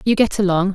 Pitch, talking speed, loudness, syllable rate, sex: 195 Hz, 240 wpm, -17 LUFS, 6.4 syllables/s, female